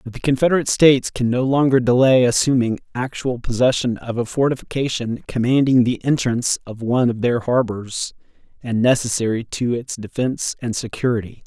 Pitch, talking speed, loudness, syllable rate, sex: 125 Hz, 150 wpm, -19 LUFS, 5.6 syllables/s, male